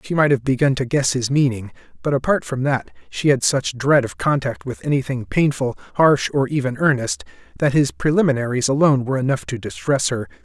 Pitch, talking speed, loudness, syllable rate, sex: 135 Hz, 195 wpm, -19 LUFS, 5.7 syllables/s, male